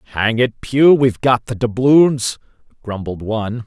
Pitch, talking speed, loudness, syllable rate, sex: 120 Hz, 150 wpm, -16 LUFS, 4.4 syllables/s, male